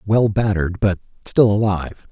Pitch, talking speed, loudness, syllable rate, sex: 100 Hz, 140 wpm, -18 LUFS, 5.2 syllables/s, male